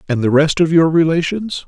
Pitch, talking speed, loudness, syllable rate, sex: 160 Hz, 215 wpm, -14 LUFS, 5.4 syllables/s, male